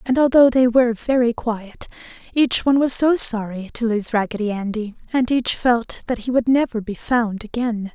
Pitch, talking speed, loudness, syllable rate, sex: 235 Hz, 190 wpm, -19 LUFS, 4.9 syllables/s, female